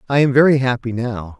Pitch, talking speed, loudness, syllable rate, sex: 125 Hz, 215 wpm, -16 LUFS, 5.8 syllables/s, male